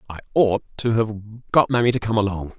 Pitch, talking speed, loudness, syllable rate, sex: 110 Hz, 210 wpm, -21 LUFS, 5.3 syllables/s, male